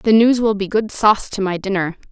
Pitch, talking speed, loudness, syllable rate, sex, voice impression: 205 Hz, 255 wpm, -17 LUFS, 5.6 syllables/s, female, feminine, adult-like, tensed, powerful, bright, slightly halting, intellectual, friendly, lively, slightly sharp